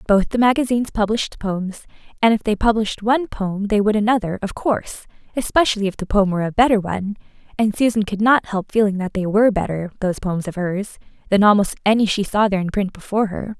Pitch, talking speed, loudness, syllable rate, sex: 210 Hz, 205 wpm, -19 LUFS, 6.2 syllables/s, female